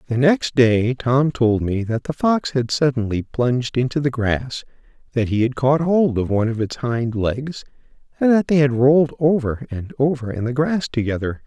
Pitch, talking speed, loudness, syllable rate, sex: 130 Hz, 200 wpm, -19 LUFS, 4.8 syllables/s, male